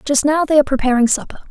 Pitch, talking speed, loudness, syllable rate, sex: 280 Hz, 240 wpm, -15 LUFS, 7.6 syllables/s, female